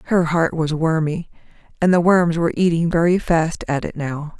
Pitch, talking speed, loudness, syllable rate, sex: 165 Hz, 190 wpm, -19 LUFS, 5.0 syllables/s, female